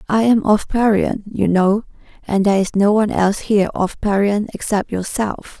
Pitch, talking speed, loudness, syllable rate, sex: 205 Hz, 180 wpm, -17 LUFS, 5.1 syllables/s, female